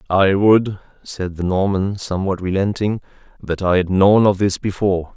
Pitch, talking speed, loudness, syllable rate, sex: 95 Hz, 165 wpm, -17 LUFS, 4.8 syllables/s, male